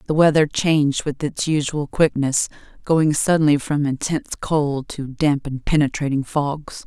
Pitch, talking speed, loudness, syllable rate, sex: 145 Hz, 150 wpm, -20 LUFS, 4.4 syllables/s, female